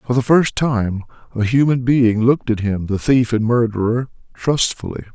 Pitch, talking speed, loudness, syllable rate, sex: 120 Hz, 175 wpm, -17 LUFS, 4.9 syllables/s, male